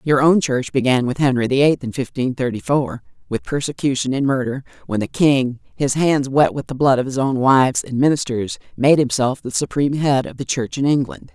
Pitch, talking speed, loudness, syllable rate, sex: 135 Hz, 215 wpm, -18 LUFS, 5.3 syllables/s, female